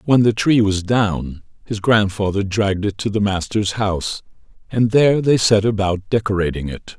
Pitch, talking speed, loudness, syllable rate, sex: 105 Hz, 170 wpm, -18 LUFS, 4.9 syllables/s, male